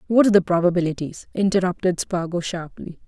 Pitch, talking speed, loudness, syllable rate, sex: 180 Hz, 135 wpm, -21 LUFS, 6.1 syllables/s, female